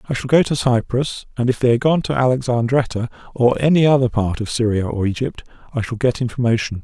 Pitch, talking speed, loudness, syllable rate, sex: 125 Hz, 210 wpm, -18 LUFS, 6.1 syllables/s, male